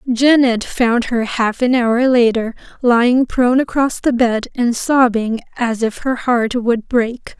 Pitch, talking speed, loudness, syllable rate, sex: 240 Hz, 160 wpm, -15 LUFS, 3.9 syllables/s, female